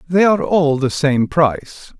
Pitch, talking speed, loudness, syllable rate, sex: 150 Hz, 180 wpm, -15 LUFS, 4.5 syllables/s, male